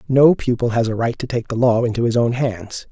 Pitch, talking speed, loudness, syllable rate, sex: 120 Hz, 265 wpm, -18 LUFS, 5.5 syllables/s, male